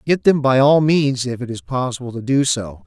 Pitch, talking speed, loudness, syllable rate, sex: 125 Hz, 250 wpm, -17 LUFS, 5.1 syllables/s, male